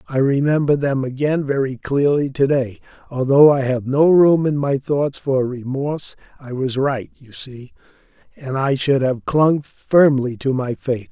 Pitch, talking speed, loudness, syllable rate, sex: 135 Hz, 175 wpm, -18 LUFS, 4.2 syllables/s, male